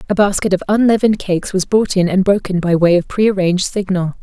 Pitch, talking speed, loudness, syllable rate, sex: 190 Hz, 215 wpm, -15 LUFS, 6.1 syllables/s, female